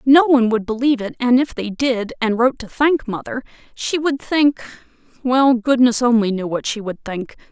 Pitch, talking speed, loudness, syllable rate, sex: 245 Hz, 190 wpm, -18 LUFS, 5.1 syllables/s, female